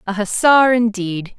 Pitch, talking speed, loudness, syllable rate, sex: 215 Hz, 130 wpm, -15 LUFS, 4.0 syllables/s, female